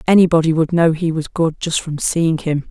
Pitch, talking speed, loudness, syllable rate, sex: 160 Hz, 220 wpm, -17 LUFS, 5.1 syllables/s, female